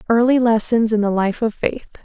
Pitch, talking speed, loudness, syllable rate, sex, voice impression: 225 Hz, 205 wpm, -17 LUFS, 5.1 syllables/s, female, feminine, adult-like, tensed, bright, soft, fluent, slightly raspy, calm, kind, modest